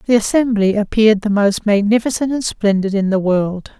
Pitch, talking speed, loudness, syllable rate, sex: 210 Hz, 175 wpm, -16 LUFS, 5.3 syllables/s, female